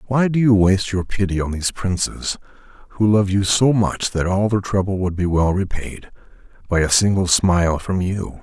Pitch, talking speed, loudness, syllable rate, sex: 95 Hz, 200 wpm, -18 LUFS, 5.1 syllables/s, male